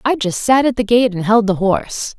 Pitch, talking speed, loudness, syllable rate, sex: 220 Hz, 275 wpm, -15 LUFS, 5.3 syllables/s, female